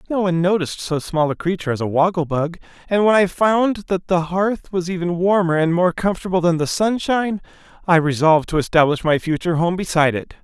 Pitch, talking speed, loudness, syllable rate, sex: 175 Hz, 205 wpm, -18 LUFS, 6.1 syllables/s, male